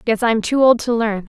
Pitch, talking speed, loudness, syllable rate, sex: 230 Hz, 265 wpm, -17 LUFS, 5.0 syllables/s, female